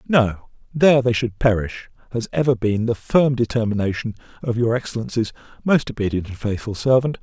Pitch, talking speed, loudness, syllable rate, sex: 120 Hz, 160 wpm, -21 LUFS, 5.6 syllables/s, male